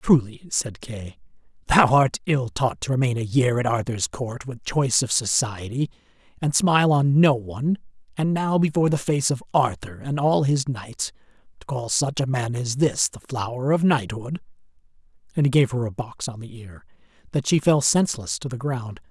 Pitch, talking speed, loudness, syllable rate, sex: 130 Hz, 190 wpm, -23 LUFS, 5.0 syllables/s, male